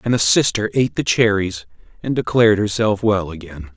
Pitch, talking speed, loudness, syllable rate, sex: 105 Hz, 175 wpm, -17 LUFS, 5.5 syllables/s, male